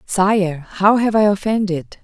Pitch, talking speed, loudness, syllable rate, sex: 200 Hz, 145 wpm, -17 LUFS, 3.9 syllables/s, female